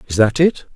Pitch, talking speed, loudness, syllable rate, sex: 135 Hz, 240 wpm, -16 LUFS, 5.9 syllables/s, male